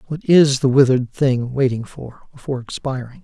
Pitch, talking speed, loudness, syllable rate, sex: 130 Hz, 165 wpm, -18 LUFS, 5.3 syllables/s, male